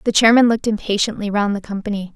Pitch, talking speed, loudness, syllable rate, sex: 210 Hz, 195 wpm, -17 LUFS, 6.9 syllables/s, female